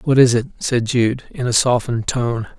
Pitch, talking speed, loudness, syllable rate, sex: 120 Hz, 210 wpm, -18 LUFS, 4.8 syllables/s, male